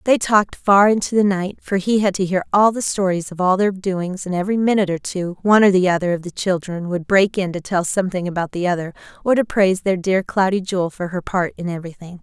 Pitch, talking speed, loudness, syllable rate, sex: 190 Hz, 250 wpm, -19 LUFS, 6.1 syllables/s, female